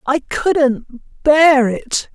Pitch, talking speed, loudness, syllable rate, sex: 270 Hz, 110 wpm, -15 LUFS, 2.0 syllables/s, female